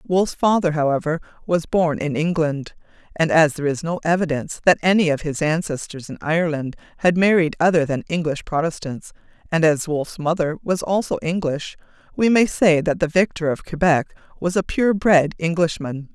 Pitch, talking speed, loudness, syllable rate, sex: 165 Hz, 170 wpm, -20 LUFS, 5.4 syllables/s, female